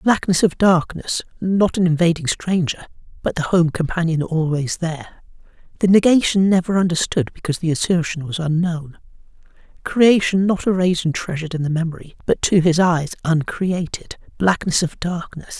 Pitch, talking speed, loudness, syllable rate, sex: 170 Hz, 130 wpm, -19 LUFS, 5.2 syllables/s, male